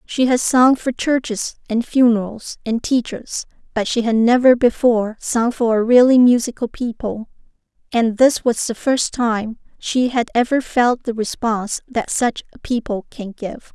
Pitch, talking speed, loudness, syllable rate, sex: 235 Hz, 165 wpm, -18 LUFS, 4.4 syllables/s, female